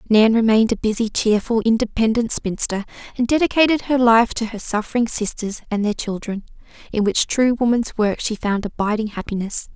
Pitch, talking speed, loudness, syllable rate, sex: 225 Hz, 165 wpm, -19 LUFS, 5.5 syllables/s, female